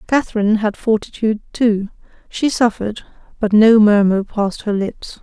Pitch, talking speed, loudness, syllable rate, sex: 215 Hz, 140 wpm, -16 LUFS, 5.2 syllables/s, female